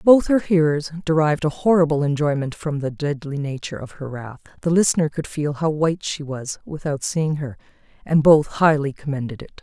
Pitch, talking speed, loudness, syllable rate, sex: 150 Hz, 175 wpm, -21 LUFS, 5.4 syllables/s, female